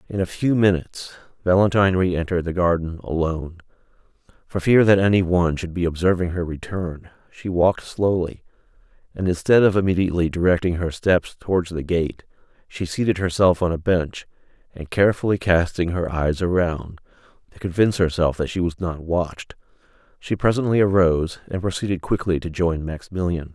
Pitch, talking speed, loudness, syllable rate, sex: 90 Hz, 155 wpm, -21 LUFS, 5.7 syllables/s, male